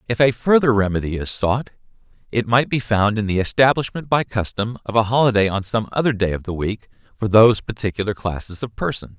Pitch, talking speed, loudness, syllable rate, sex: 110 Hz, 200 wpm, -19 LUFS, 5.9 syllables/s, male